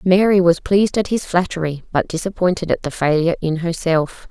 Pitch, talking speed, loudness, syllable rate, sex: 175 Hz, 180 wpm, -18 LUFS, 5.6 syllables/s, female